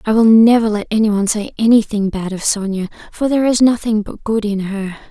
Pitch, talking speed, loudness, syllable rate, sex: 215 Hz, 210 wpm, -15 LUFS, 5.7 syllables/s, female